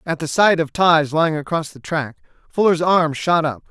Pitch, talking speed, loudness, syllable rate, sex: 160 Hz, 210 wpm, -18 LUFS, 5.0 syllables/s, male